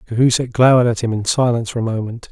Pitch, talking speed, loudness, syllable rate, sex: 115 Hz, 235 wpm, -16 LUFS, 7.3 syllables/s, male